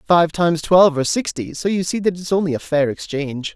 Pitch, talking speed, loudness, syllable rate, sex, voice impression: 165 Hz, 255 wpm, -18 LUFS, 6.5 syllables/s, male, very masculine, middle-aged, slightly thick, tensed, slightly powerful, bright, slightly soft, clear, fluent, slightly raspy, cool, intellectual, very refreshing, sincere, calm, slightly mature, very friendly, very reassuring, slightly unique, slightly elegant, wild, sweet, lively, kind